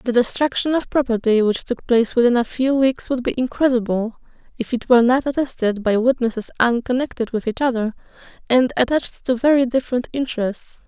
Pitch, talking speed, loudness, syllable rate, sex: 245 Hz, 170 wpm, -19 LUFS, 5.8 syllables/s, female